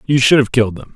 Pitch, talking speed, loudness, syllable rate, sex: 125 Hz, 315 wpm, -14 LUFS, 7.1 syllables/s, male